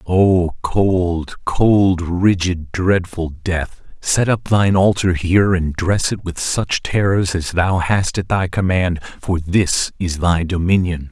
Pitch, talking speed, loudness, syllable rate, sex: 90 Hz, 150 wpm, -17 LUFS, 3.6 syllables/s, male